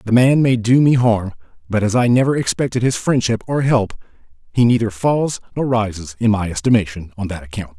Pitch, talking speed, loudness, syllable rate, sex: 110 Hz, 200 wpm, -17 LUFS, 5.6 syllables/s, male